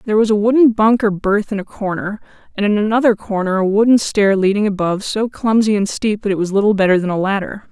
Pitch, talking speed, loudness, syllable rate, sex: 205 Hz, 235 wpm, -16 LUFS, 6.2 syllables/s, female